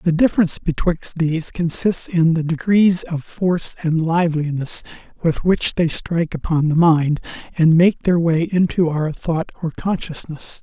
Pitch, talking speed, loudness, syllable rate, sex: 165 Hz, 160 wpm, -18 LUFS, 4.6 syllables/s, male